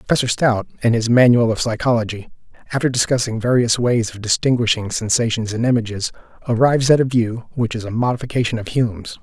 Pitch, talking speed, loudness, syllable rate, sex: 115 Hz, 170 wpm, -18 LUFS, 6.2 syllables/s, male